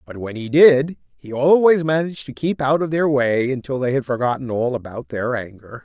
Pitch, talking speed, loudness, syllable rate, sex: 135 Hz, 215 wpm, -19 LUFS, 5.3 syllables/s, male